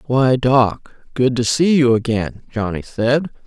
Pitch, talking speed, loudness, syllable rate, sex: 125 Hz, 155 wpm, -17 LUFS, 3.7 syllables/s, female